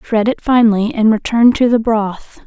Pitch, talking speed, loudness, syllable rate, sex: 225 Hz, 195 wpm, -13 LUFS, 4.7 syllables/s, female